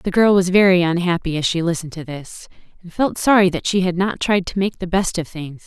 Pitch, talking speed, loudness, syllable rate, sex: 180 Hz, 255 wpm, -18 LUFS, 5.7 syllables/s, female